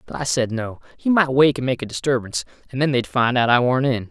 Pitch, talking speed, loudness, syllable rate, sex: 125 Hz, 280 wpm, -20 LUFS, 6.2 syllables/s, male